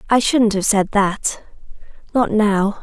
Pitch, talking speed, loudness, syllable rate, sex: 215 Hz, 125 wpm, -17 LUFS, 3.6 syllables/s, female